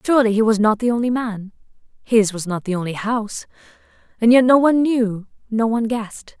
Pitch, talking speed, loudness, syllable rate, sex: 225 Hz, 190 wpm, -18 LUFS, 6.0 syllables/s, female